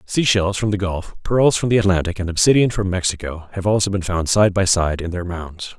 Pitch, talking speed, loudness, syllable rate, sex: 95 Hz, 240 wpm, -19 LUFS, 5.4 syllables/s, male